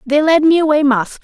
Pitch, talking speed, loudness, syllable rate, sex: 290 Hz, 245 wpm, -12 LUFS, 5.9 syllables/s, female